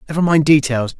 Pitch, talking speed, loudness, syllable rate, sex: 145 Hz, 180 wpm, -15 LUFS, 6.2 syllables/s, male